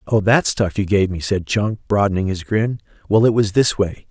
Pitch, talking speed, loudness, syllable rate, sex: 105 Hz, 235 wpm, -18 LUFS, 4.9 syllables/s, male